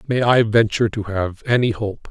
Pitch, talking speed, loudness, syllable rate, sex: 110 Hz, 200 wpm, -18 LUFS, 5.2 syllables/s, male